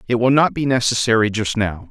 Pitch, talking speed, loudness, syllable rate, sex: 120 Hz, 220 wpm, -17 LUFS, 5.7 syllables/s, male